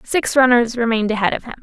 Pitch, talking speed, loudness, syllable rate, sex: 235 Hz, 220 wpm, -16 LUFS, 6.9 syllables/s, female